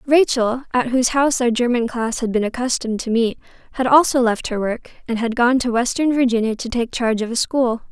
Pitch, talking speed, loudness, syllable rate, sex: 240 Hz, 220 wpm, -19 LUFS, 5.8 syllables/s, female